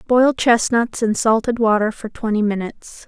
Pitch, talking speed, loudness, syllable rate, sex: 225 Hz, 155 wpm, -18 LUFS, 4.8 syllables/s, female